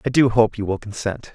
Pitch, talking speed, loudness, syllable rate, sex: 110 Hz, 265 wpm, -20 LUFS, 5.8 syllables/s, male